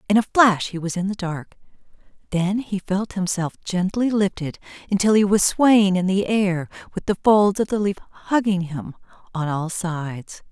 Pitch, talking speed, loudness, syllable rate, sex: 190 Hz, 185 wpm, -21 LUFS, 4.7 syllables/s, female